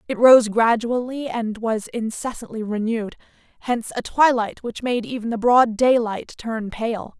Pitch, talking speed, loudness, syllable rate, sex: 230 Hz, 150 wpm, -21 LUFS, 4.6 syllables/s, female